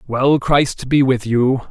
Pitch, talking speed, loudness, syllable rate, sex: 130 Hz, 175 wpm, -16 LUFS, 3.4 syllables/s, male